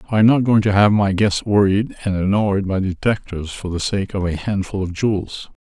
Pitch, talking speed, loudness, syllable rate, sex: 100 Hz, 225 wpm, -18 LUFS, 5.3 syllables/s, male